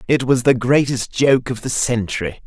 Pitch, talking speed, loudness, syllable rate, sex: 125 Hz, 195 wpm, -17 LUFS, 4.8 syllables/s, male